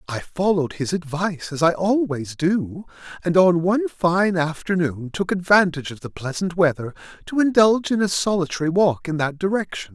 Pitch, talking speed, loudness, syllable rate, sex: 175 Hz, 170 wpm, -21 LUFS, 5.4 syllables/s, male